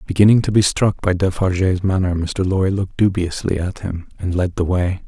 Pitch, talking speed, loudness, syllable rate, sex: 95 Hz, 200 wpm, -18 LUFS, 5.4 syllables/s, male